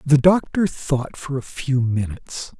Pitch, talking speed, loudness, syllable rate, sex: 140 Hz, 160 wpm, -21 LUFS, 4.1 syllables/s, male